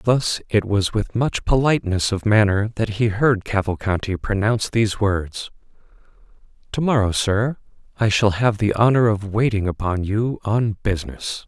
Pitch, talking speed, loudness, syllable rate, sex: 105 Hz, 150 wpm, -20 LUFS, 4.7 syllables/s, male